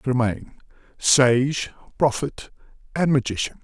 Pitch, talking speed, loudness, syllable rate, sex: 130 Hz, 85 wpm, -21 LUFS, 3.9 syllables/s, male